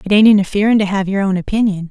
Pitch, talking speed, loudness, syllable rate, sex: 200 Hz, 250 wpm, -14 LUFS, 7.2 syllables/s, female